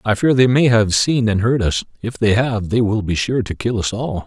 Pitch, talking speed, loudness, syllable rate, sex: 110 Hz, 280 wpm, -17 LUFS, 5.0 syllables/s, male